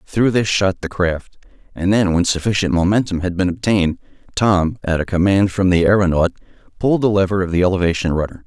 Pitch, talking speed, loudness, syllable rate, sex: 95 Hz, 190 wpm, -17 LUFS, 5.9 syllables/s, male